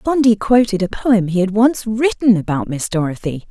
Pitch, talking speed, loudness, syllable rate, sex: 210 Hz, 190 wpm, -16 LUFS, 4.9 syllables/s, female